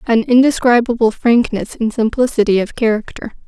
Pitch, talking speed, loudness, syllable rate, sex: 230 Hz, 120 wpm, -14 LUFS, 5.3 syllables/s, female